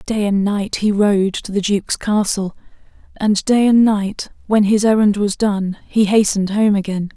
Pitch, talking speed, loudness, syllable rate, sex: 205 Hz, 185 wpm, -16 LUFS, 4.5 syllables/s, female